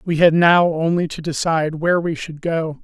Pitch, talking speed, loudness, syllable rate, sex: 165 Hz, 210 wpm, -18 LUFS, 5.2 syllables/s, male